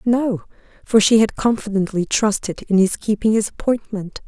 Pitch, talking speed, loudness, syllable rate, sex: 210 Hz, 155 wpm, -19 LUFS, 4.8 syllables/s, female